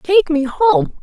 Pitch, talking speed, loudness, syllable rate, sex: 320 Hz, 175 wpm, -15 LUFS, 4.3 syllables/s, female